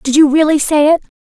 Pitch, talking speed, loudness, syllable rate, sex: 300 Hz, 245 wpm, -11 LUFS, 5.8 syllables/s, female